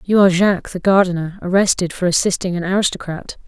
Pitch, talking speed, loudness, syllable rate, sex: 185 Hz, 175 wpm, -17 LUFS, 6.4 syllables/s, female